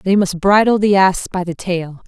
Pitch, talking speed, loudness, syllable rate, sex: 190 Hz, 230 wpm, -15 LUFS, 4.6 syllables/s, female